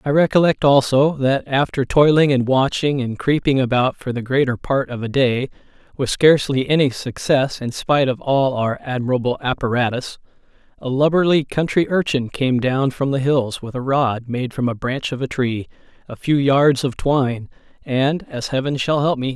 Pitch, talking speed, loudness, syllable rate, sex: 135 Hz, 185 wpm, -18 LUFS, 4.9 syllables/s, male